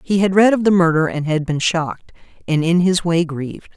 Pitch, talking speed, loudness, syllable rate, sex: 170 Hz, 240 wpm, -17 LUFS, 5.5 syllables/s, female